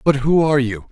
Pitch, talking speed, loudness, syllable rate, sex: 130 Hz, 260 wpm, -16 LUFS, 6.3 syllables/s, male